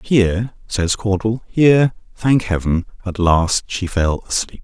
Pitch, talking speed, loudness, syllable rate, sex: 100 Hz, 140 wpm, -18 LUFS, 4.5 syllables/s, male